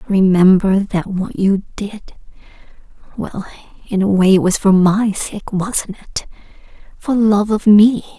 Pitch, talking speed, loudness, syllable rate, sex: 200 Hz, 140 wpm, -15 LUFS, 4.0 syllables/s, female